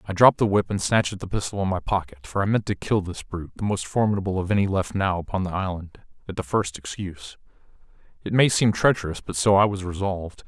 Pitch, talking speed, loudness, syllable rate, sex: 95 Hz, 240 wpm, -24 LUFS, 6.4 syllables/s, male